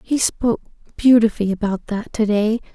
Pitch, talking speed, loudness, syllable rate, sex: 220 Hz, 130 wpm, -19 LUFS, 5.6 syllables/s, female